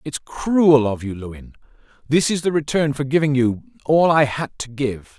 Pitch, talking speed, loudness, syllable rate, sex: 140 Hz, 185 wpm, -19 LUFS, 4.5 syllables/s, male